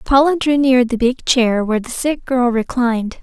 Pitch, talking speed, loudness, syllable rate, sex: 250 Hz, 225 wpm, -16 LUFS, 4.9 syllables/s, female